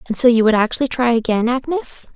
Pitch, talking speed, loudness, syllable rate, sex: 245 Hz, 225 wpm, -16 LUFS, 6.3 syllables/s, female